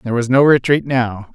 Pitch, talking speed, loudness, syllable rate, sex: 125 Hz, 220 wpm, -15 LUFS, 5.4 syllables/s, male